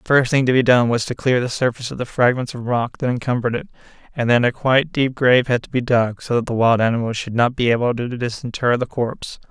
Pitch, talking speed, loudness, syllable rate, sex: 125 Hz, 265 wpm, -19 LUFS, 6.4 syllables/s, male